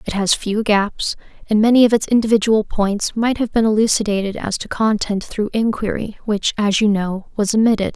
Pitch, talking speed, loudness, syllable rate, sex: 210 Hz, 190 wpm, -17 LUFS, 5.1 syllables/s, female